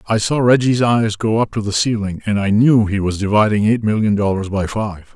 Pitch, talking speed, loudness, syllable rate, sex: 105 Hz, 235 wpm, -16 LUFS, 5.2 syllables/s, male